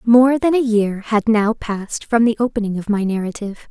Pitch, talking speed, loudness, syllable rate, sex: 220 Hz, 210 wpm, -18 LUFS, 5.3 syllables/s, female